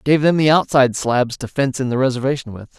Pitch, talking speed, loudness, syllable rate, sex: 135 Hz, 235 wpm, -17 LUFS, 6.5 syllables/s, male